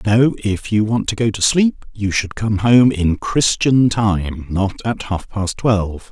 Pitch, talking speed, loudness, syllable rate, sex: 105 Hz, 195 wpm, -17 LUFS, 3.8 syllables/s, male